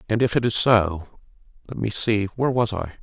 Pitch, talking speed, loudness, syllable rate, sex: 105 Hz, 200 wpm, -22 LUFS, 5.4 syllables/s, male